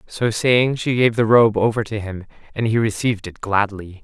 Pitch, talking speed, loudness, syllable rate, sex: 110 Hz, 210 wpm, -18 LUFS, 5.0 syllables/s, male